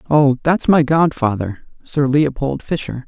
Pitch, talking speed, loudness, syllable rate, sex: 140 Hz, 135 wpm, -17 LUFS, 4.1 syllables/s, male